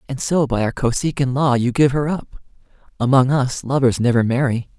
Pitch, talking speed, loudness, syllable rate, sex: 130 Hz, 190 wpm, -18 LUFS, 5.3 syllables/s, male